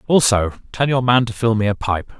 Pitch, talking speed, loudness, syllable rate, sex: 115 Hz, 245 wpm, -18 LUFS, 5.5 syllables/s, male